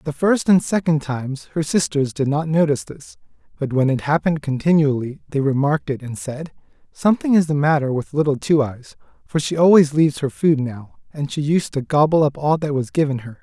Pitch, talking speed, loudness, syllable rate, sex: 150 Hz, 210 wpm, -19 LUFS, 5.6 syllables/s, male